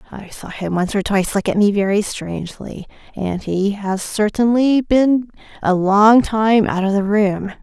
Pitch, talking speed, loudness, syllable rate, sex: 205 Hz, 180 wpm, -17 LUFS, 4.3 syllables/s, female